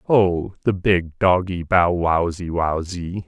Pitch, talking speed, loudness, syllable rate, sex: 90 Hz, 75 wpm, -20 LUFS, 3.5 syllables/s, male